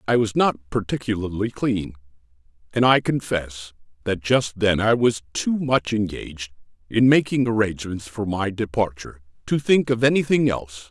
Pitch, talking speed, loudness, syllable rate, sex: 110 Hz, 150 wpm, -22 LUFS, 5.0 syllables/s, male